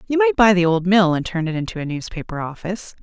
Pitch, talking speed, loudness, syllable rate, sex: 190 Hz, 260 wpm, -19 LUFS, 6.5 syllables/s, female